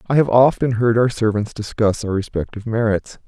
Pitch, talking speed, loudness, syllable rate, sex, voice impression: 110 Hz, 185 wpm, -18 LUFS, 5.5 syllables/s, male, very masculine, very adult-like, old, very thick, relaxed, weak, dark, soft, muffled, fluent, slightly raspy, slightly cool, intellectual, sincere, calm, slightly friendly, slightly reassuring, unique, slightly elegant, wild, slightly sweet, slightly lively, very kind, very modest